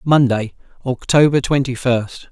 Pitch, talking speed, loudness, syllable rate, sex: 130 Hz, 105 wpm, -17 LUFS, 4.2 syllables/s, male